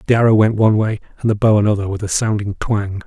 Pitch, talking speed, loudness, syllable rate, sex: 105 Hz, 255 wpm, -16 LUFS, 6.8 syllables/s, male